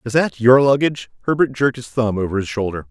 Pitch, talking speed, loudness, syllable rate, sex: 120 Hz, 230 wpm, -18 LUFS, 6.6 syllables/s, male